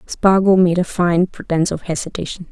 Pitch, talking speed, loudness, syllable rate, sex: 175 Hz, 165 wpm, -17 LUFS, 5.5 syllables/s, female